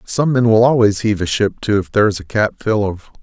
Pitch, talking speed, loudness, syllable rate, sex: 105 Hz, 280 wpm, -16 LUFS, 6.2 syllables/s, male